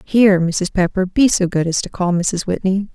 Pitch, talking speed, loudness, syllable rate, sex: 190 Hz, 225 wpm, -17 LUFS, 5.0 syllables/s, female